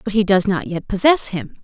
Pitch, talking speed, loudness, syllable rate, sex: 200 Hz, 255 wpm, -18 LUFS, 5.3 syllables/s, female